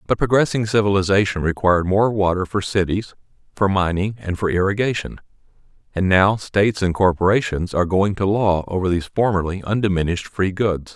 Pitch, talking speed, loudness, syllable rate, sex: 95 Hz, 155 wpm, -19 LUFS, 5.8 syllables/s, male